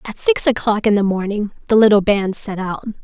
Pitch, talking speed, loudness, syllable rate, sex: 210 Hz, 220 wpm, -16 LUFS, 5.3 syllables/s, female